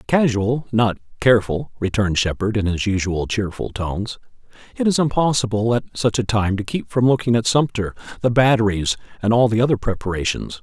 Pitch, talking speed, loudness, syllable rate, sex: 110 Hz, 170 wpm, -20 LUFS, 5.6 syllables/s, male